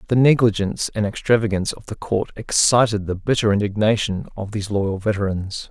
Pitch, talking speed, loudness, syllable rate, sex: 105 Hz, 160 wpm, -20 LUFS, 5.8 syllables/s, male